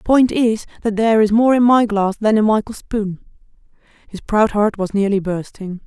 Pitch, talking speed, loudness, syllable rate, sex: 215 Hz, 205 wpm, -16 LUFS, 5.2 syllables/s, female